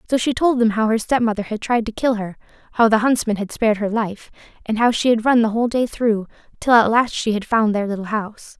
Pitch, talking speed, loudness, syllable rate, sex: 225 Hz, 260 wpm, -19 LUFS, 6.0 syllables/s, female